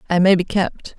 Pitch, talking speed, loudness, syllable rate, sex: 185 Hz, 245 wpm, -18 LUFS, 5.1 syllables/s, female